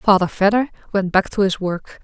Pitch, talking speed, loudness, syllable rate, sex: 195 Hz, 205 wpm, -19 LUFS, 5.2 syllables/s, female